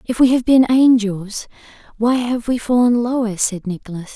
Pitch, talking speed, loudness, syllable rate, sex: 230 Hz, 175 wpm, -16 LUFS, 4.9 syllables/s, female